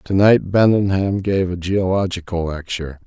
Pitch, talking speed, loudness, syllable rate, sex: 95 Hz, 135 wpm, -18 LUFS, 4.7 syllables/s, male